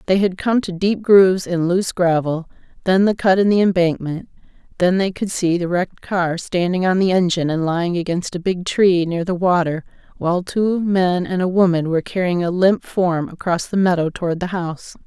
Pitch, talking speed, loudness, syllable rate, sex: 180 Hz, 205 wpm, -18 LUFS, 5.3 syllables/s, female